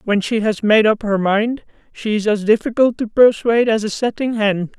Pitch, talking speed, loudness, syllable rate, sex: 220 Hz, 215 wpm, -16 LUFS, 5.1 syllables/s, female